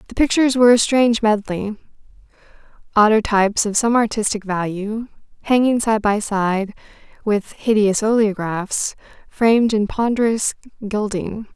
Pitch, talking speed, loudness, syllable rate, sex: 215 Hz, 110 wpm, -18 LUFS, 4.8 syllables/s, female